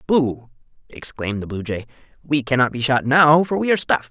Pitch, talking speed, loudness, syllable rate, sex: 135 Hz, 205 wpm, -19 LUFS, 5.9 syllables/s, male